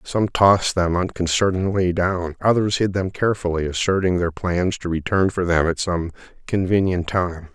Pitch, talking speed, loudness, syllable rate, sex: 90 Hz, 160 wpm, -20 LUFS, 4.9 syllables/s, male